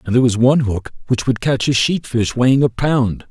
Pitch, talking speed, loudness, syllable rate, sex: 125 Hz, 255 wpm, -16 LUFS, 5.6 syllables/s, male